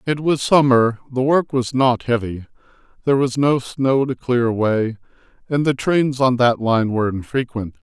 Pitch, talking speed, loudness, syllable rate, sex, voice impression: 125 Hz, 175 wpm, -18 LUFS, 4.8 syllables/s, male, masculine, slightly old, thick, slightly muffled, calm, slightly elegant